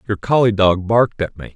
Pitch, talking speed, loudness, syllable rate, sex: 105 Hz, 230 wpm, -16 LUFS, 5.8 syllables/s, male